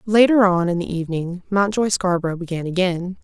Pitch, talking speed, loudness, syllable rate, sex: 185 Hz, 165 wpm, -19 LUFS, 5.6 syllables/s, female